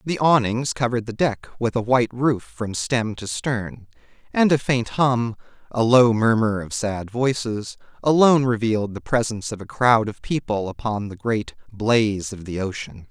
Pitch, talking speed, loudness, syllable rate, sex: 115 Hz, 180 wpm, -21 LUFS, 4.7 syllables/s, male